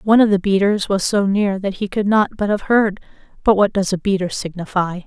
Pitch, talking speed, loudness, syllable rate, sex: 200 Hz, 225 wpm, -18 LUFS, 5.7 syllables/s, female